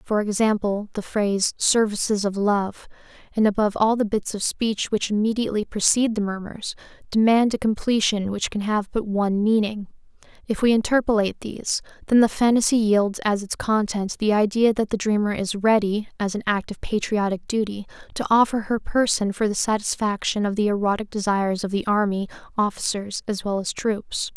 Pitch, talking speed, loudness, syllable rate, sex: 210 Hz, 175 wpm, -22 LUFS, 5.4 syllables/s, female